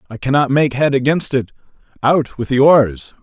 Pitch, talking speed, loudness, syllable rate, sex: 135 Hz, 185 wpm, -15 LUFS, 4.9 syllables/s, male